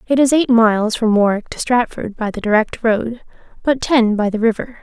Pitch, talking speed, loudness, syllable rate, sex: 230 Hz, 210 wpm, -16 LUFS, 5.2 syllables/s, female